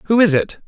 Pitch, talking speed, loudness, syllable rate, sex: 190 Hz, 265 wpm, -15 LUFS, 6.4 syllables/s, male